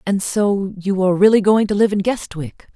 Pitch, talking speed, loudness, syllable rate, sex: 200 Hz, 220 wpm, -17 LUFS, 5.2 syllables/s, female